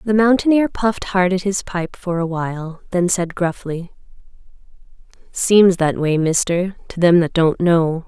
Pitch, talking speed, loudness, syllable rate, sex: 180 Hz, 165 wpm, -17 LUFS, 4.4 syllables/s, female